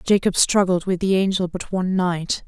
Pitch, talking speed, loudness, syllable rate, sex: 185 Hz, 195 wpm, -20 LUFS, 5.2 syllables/s, female